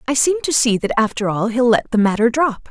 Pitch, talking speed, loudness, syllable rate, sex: 235 Hz, 265 wpm, -17 LUFS, 5.8 syllables/s, female